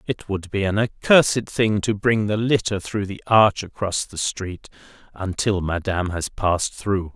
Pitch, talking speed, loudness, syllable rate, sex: 100 Hz, 175 wpm, -21 LUFS, 4.5 syllables/s, male